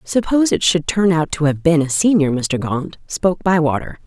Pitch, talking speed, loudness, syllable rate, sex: 165 Hz, 205 wpm, -17 LUFS, 5.2 syllables/s, female